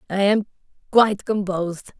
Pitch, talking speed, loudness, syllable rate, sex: 195 Hz, 90 wpm, -21 LUFS, 5.8 syllables/s, female